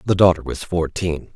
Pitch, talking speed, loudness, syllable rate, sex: 85 Hz, 175 wpm, -20 LUFS, 4.9 syllables/s, male